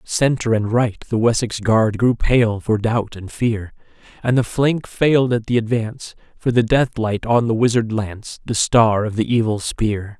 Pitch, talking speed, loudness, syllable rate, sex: 115 Hz, 195 wpm, -18 LUFS, 4.4 syllables/s, male